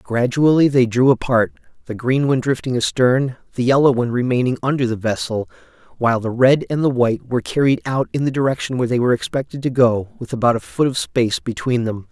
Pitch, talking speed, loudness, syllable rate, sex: 125 Hz, 210 wpm, -18 LUFS, 6.2 syllables/s, male